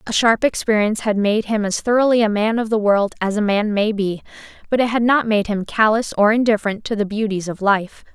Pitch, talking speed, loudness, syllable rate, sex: 215 Hz, 235 wpm, -18 LUFS, 5.7 syllables/s, female